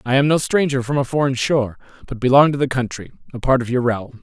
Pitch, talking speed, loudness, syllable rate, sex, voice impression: 130 Hz, 255 wpm, -18 LUFS, 6.4 syllables/s, male, masculine, adult-like, slightly middle-aged, slightly thick, slightly tensed, slightly powerful, bright, very hard, slightly muffled, very fluent, slightly raspy, slightly cool, intellectual, slightly refreshing, sincere, very calm, very mature, friendly, reassuring, unique, wild, slightly sweet, slightly lively, slightly strict, slightly sharp